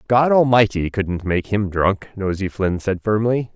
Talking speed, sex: 170 wpm, male